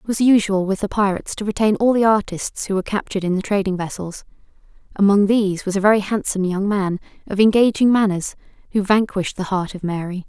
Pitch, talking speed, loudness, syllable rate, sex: 200 Hz, 205 wpm, -19 LUFS, 6.3 syllables/s, female